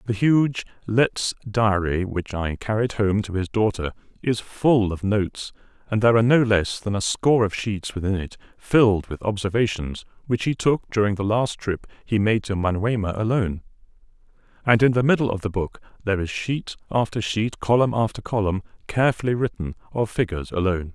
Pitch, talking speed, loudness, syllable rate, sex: 105 Hz, 180 wpm, -23 LUFS, 5.4 syllables/s, male